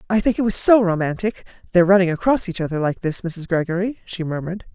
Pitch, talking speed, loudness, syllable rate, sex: 185 Hz, 200 wpm, -19 LUFS, 6.2 syllables/s, female